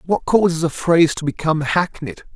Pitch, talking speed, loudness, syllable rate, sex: 160 Hz, 180 wpm, -18 LUFS, 5.7 syllables/s, male